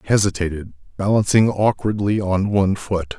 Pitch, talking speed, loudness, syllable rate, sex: 100 Hz, 130 wpm, -19 LUFS, 5.2 syllables/s, male